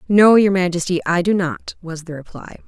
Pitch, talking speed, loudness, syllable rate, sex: 180 Hz, 200 wpm, -16 LUFS, 5.1 syllables/s, female